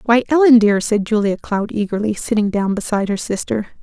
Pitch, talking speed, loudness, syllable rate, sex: 215 Hz, 190 wpm, -17 LUFS, 5.7 syllables/s, female